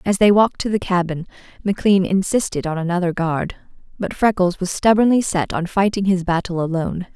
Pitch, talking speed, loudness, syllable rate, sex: 185 Hz, 175 wpm, -19 LUFS, 5.8 syllables/s, female